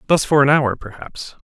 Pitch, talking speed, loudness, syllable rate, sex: 135 Hz, 205 wpm, -16 LUFS, 5.0 syllables/s, male